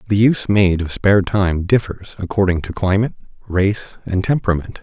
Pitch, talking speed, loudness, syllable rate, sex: 95 Hz, 160 wpm, -18 LUFS, 5.5 syllables/s, male